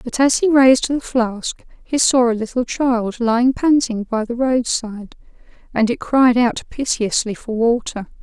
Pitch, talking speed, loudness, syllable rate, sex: 240 Hz, 170 wpm, -17 LUFS, 4.5 syllables/s, female